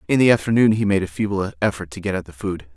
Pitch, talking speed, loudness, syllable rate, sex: 95 Hz, 285 wpm, -20 LUFS, 6.8 syllables/s, male